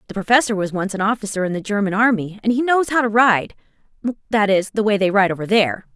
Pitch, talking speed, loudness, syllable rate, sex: 210 Hz, 230 wpm, -18 LUFS, 6.5 syllables/s, female